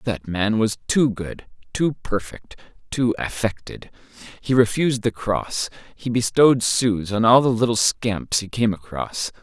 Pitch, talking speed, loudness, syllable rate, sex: 110 Hz, 155 wpm, -21 LUFS, 4.3 syllables/s, male